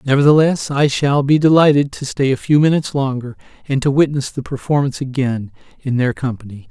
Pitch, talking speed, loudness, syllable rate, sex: 135 Hz, 180 wpm, -16 LUFS, 5.8 syllables/s, male